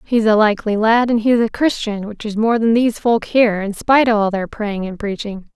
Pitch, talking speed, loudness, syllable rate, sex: 220 Hz, 250 wpm, -16 LUFS, 5.6 syllables/s, female